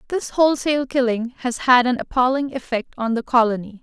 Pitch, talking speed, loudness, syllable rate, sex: 250 Hz, 170 wpm, -20 LUFS, 5.6 syllables/s, female